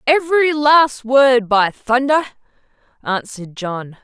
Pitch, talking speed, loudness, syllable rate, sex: 255 Hz, 105 wpm, -15 LUFS, 3.9 syllables/s, female